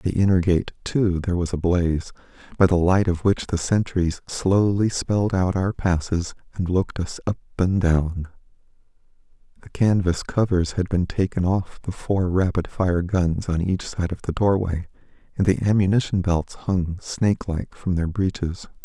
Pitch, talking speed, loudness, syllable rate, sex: 90 Hz, 170 wpm, -22 LUFS, 4.7 syllables/s, male